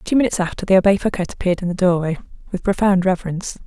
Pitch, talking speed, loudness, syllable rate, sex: 185 Hz, 215 wpm, -19 LUFS, 7.9 syllables/s, female